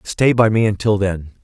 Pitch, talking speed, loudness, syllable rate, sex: 105 Hz, 210 wpm, -16 LUFS, 4.9 syllables/s, male